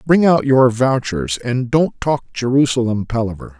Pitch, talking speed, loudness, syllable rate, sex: 125 Hz, 150 wpm, -17 LUFS, 4.5 syllables/s, male